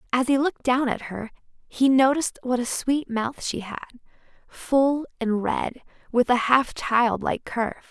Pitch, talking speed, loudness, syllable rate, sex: 250 Hz, 165 wpm, -23 LUFS, 4.5 syllables/s, female